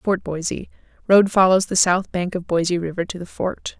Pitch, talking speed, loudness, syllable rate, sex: 180 Hz, 190 wpm, -20 LUFS, 5.0 syllables/s, female